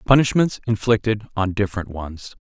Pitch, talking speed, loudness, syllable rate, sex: 105 Hz, 125 wpm, -21 LUFS, 5.2 syllables/s, male